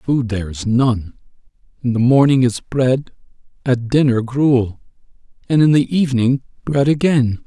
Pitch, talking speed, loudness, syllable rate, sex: 125 Hz, 145 wpm, -16 LUFS, 4.5 syllables/s, male